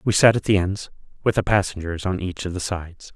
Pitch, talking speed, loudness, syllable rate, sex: 95 Hz, 245 wpm, -22 LUFS, 5.9 syllables/s, male